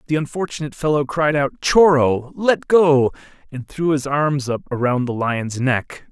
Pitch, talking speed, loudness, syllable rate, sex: 140 Hz, 165 wpm, -18 LUFS, 4.6 syllables/s, male